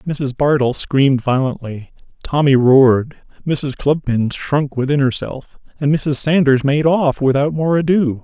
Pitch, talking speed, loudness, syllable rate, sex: 140 Hz, 140 wpm, -16 LUFS, 4.3 syllables/s, male